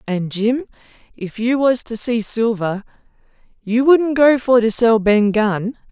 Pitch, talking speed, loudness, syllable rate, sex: 230 Hz, 160 wpm, -16 LUFS, 3.9 syllables/s, female